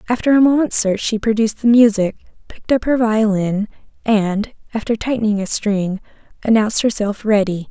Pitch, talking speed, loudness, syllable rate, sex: 215 Hz, 155 wpm, -17 LUFS, 5.5 syllables/s, female